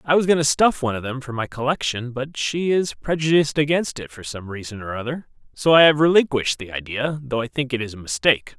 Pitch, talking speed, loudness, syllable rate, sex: 135 Hz, 245 wpm, -21 LUFS, 6.1 syllables/s, male